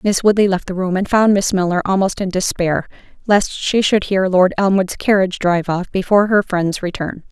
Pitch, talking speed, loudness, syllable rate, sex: 190 Hz, 205 wpm, -16 LUFS, 5.4 syllables/s, female